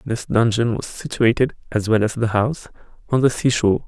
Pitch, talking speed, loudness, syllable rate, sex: 115 Hz, 185 wpm, -19 LUFS, 5.6 syllables/s, male